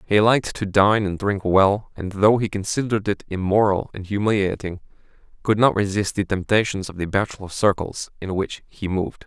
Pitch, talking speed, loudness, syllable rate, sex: 100 Hz, 180 wpm, -21 LUFS, 5.3 syllables/s, male